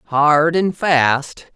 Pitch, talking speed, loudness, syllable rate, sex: 150 Hz, 115 wpm, -15 LUFS, 2.0 syllables/s, female